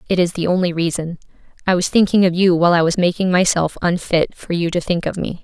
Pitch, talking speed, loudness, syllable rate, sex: 175 Hz, 245 wpm, -17 LUFS, 6.1 syllables/s, female